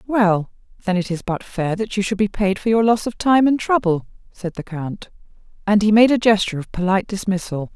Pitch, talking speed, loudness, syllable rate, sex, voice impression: 200 Hz, 225 wpm, -19 LUFS, 5.6 syllables/s, female, slightly feminine, very adult-like, slightly muffled, fluent, slightly calm, slightly unique